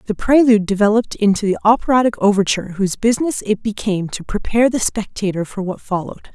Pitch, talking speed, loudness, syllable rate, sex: 210 Hz, 170 wpm, -17 LUFS, 6.9 syllables/s, female